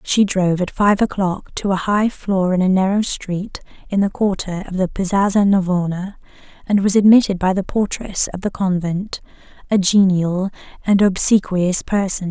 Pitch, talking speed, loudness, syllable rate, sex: 190 Hz, 165 wpm, -18 LUFS, 4.7 syllables/s, female